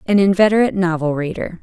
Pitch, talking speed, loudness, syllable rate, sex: 185 Hz, 150 wpm, -16 LUFS, 6.5 syllables/s, female